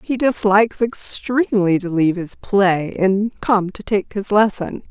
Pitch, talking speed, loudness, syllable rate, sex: 205 Hz, 160 wpm, -18 LUFS, 4.2 syllables/s, female